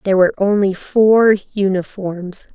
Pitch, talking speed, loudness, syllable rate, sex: 195 Hz, 120 wpm, -15 LUFS, 4.3 syllables/s, female